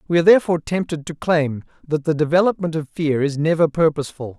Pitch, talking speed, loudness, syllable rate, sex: 160 Hz, 190 wpm, -19 LUFS, 6.4 syllables/s, male